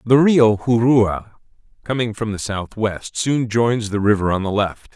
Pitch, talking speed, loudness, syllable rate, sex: 110 Hz, 170 wpm, -18 LUFS, 4.2 syllables/s, male